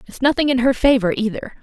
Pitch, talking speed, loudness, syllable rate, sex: 245 Hz, 220 wpm, -17 LUFS, 6.3 syllables/s, female